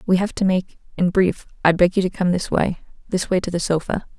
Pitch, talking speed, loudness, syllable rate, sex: 180 Hz, 260 wpm, -20 LUFS, 5.7 syllables/s, female